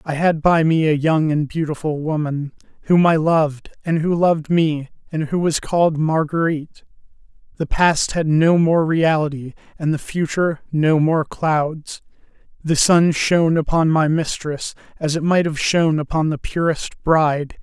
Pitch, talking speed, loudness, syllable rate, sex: 155 Hz, 165 wpm, -18 LUFS, 4.6 syllables/s, male